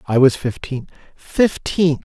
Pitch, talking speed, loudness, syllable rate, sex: 145 Hz, 85 wpm, -19 LUFS, 3.7 syllables/s, male